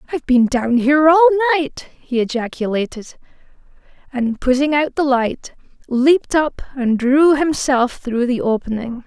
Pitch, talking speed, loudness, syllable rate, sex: 270 Hz, 140 wpm, -17 LUFS, 4.6 syllables/s, female